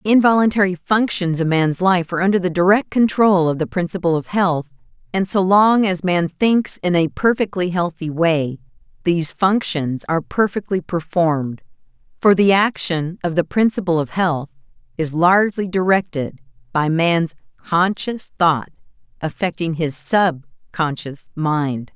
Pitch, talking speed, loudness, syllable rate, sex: 175 Hz, 140 wpm, -18 LUFS, 4.6 syllables/s, female